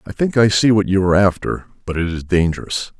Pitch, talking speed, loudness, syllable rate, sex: 100 Hz, 240 wpm, -17 LUFS, 6.0 syllables/s, male